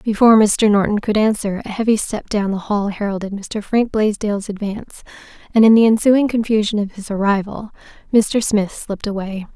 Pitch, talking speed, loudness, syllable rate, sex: 210 Hz, 175 wpm, -17 LUFS, 5.3 syllables/s, female